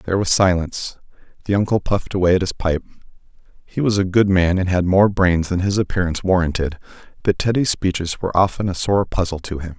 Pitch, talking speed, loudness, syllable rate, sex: 90 Hz, 200 wpm, -19 LUFS, 6.1 syllables/s, male